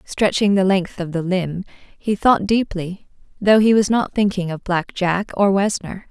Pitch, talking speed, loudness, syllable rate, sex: 195 Hz, 185 wpm, -18 LUFS, 4.2 syllables/s, female